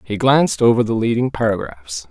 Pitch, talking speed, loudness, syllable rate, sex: 120 Hz, 170 wpm, -17 LUFS, 5.5 syllables/s, male